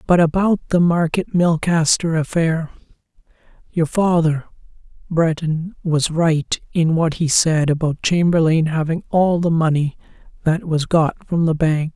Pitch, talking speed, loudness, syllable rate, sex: 165 Hz, 135 wpm, -18 LUFS, 4.2 syllables/s, male